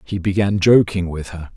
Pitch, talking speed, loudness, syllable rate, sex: 95 Hz, 190 wpm, -17 LUFS, 4.8 syllables/s, male